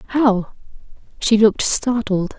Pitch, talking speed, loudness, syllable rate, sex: 215 Hz, 100 wpm, -17 LUFS, 3.5 syllables/s, female